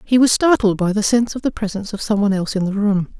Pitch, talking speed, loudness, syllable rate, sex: 210 Hz, 300 wpm, -18 LUFS, 7.2 syllables/s, female